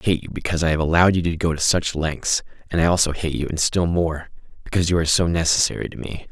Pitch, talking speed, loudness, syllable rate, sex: 85 Hz, 255 wpm, -20 LUFS, 6.9 syllables/s, male